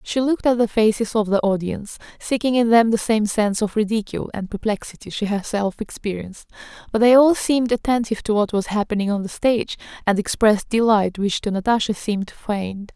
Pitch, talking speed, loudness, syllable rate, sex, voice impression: 215 Hz, 190 wpm, -20 LUFS, 6.1 syllables/s, female, feminine, slightly adult-like, slightly fluent, slightly cute, sincere, slightly calm, friendly, slightly sweet